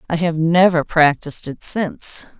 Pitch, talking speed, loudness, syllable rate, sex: 165 Hz, 150 wpm, -17 LUFS, 4.7 syllables/s, female